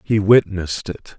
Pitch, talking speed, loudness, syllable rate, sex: 100 Hz, 150 wpm, -17 LUFS, 4.6 syllables/s, male